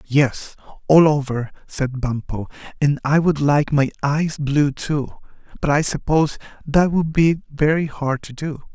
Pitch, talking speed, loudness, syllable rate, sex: 145 Hz, 150 wpm, -19 LUFS, 4.0 syllables/s, male